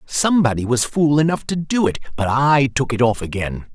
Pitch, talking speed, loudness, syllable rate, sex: 135 Hz, 210 wpm, -18 LUFS, 5.4 syllables/s, male